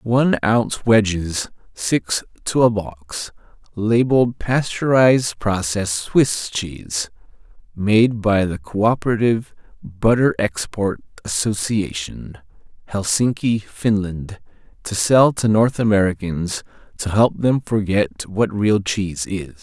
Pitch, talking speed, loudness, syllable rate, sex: 105 Hz, 105 wpm, -19 LUFS, 3.8 syllables/s, male